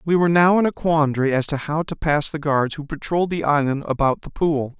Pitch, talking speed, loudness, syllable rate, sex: 150 Hz, 250 wpm, -20 LUFS, 5.8 syllables/s, male